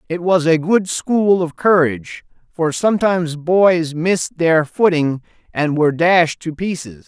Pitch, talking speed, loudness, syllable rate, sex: 170 Hz, 155 wpm, -16 LUFS, 4.3 syllables/s, male